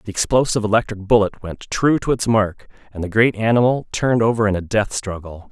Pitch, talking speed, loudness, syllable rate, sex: 110 Hz, 205 wpm, -18 LUFS, 5.8 syllables/s, male